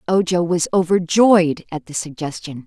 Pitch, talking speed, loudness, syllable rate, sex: 175 Hz, 135 wpm, -18 LUFS, 4.6 syllables/s, female